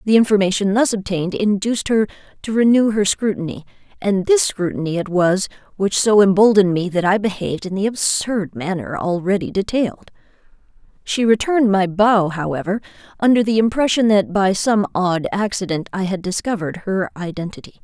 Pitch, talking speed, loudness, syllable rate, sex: 200 Hz, 155 wpm, -18 LUFS, 5.5 syllables/s, female